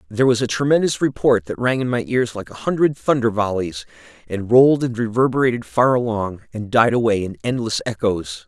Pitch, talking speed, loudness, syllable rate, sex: 120 Hz, 190 wpm, -19 LUFS, 5.6 syllables/s, male